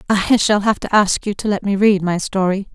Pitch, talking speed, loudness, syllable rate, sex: 200 Hz, 260 wpm, -17 LUFS, 5.1 syllables/s, female